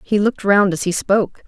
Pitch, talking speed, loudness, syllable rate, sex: 200 Hz, 245 wpm, -17 LUFS, 6.0 syllables/s, female